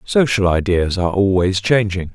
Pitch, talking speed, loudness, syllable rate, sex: 100 Hz, 140 wpm, -16 LUFS, 4.9 syllables/s, male